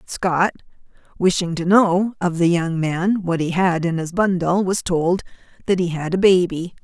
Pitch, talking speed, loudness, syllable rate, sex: 175 Hz, 185 wpm, -19 LUFS, 4.4 syllables/s, female